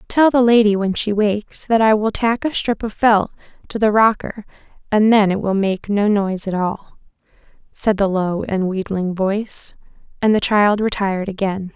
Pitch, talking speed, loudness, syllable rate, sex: 205 Hz, 190 wpm, -17 LUFS, 4.9 syllables/s, female